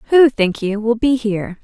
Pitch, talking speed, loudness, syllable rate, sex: 230 Hz, 220 wpm, -16 LUFS, 5.1 syllables/s, female